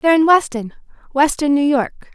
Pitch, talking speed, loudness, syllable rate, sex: 285 Hz, 140 wpm, -16 LUFS, 5.9 syllables/s, female